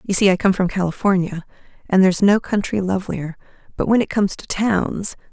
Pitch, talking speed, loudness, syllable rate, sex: 190 Hz, 190 wpm, -19 LUFS, 5.8 syllables/s, female